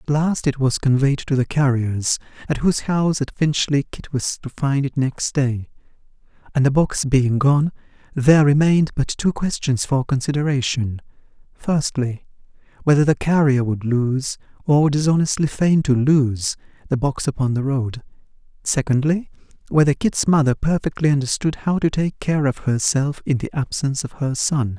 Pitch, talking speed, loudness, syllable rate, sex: 140 Hz, 160 wpm, -20 LUFS, 4.8 syllables/s, male